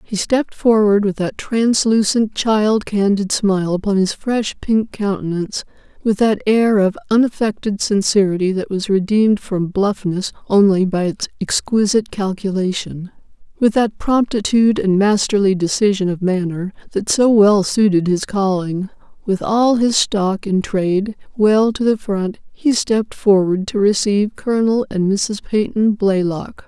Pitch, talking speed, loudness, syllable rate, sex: 205 Hz, 140 wpm, -17 LUFS, 4.5 syllables/s, female